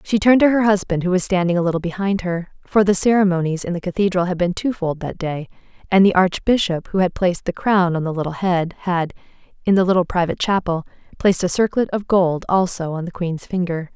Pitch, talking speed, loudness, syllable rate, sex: 180 Hz, 220 wpm, -19 LUFS, 6.0 syllables/s, female